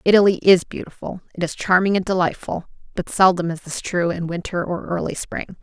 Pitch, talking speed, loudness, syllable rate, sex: 180 Hz, 190 wpm, -20 LUFS, 5.5 syllables/s, female